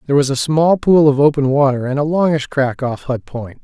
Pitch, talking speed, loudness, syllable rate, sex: 140 Hz, 250 wpm, -15 LUFS, 5.5 syllables/s, male